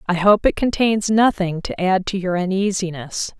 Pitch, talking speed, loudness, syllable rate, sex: 190 Hz, 175 wpm, -19 LUFS, 4.7 syllables/s, female